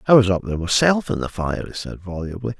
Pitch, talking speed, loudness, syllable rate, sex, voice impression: 100 Hz, 255 wpm, -21 LUFS, 6.2 syllables/s, male, masculine, adult-like, tensed, powerful, slightly hard, muffled, slightly raspy, cool, calm, mature, wild, slightly lively, slightly strict, slightly modest